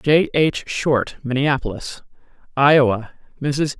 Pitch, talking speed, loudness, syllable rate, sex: 140 Hz, 95 wpm, -19 LUFS, 3.9 syllables/s, female